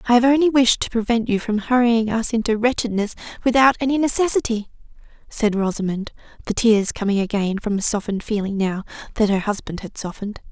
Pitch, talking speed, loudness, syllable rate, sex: 220 Hz, 175 wpm, -20 LUFS, 6.0 syllables/s, female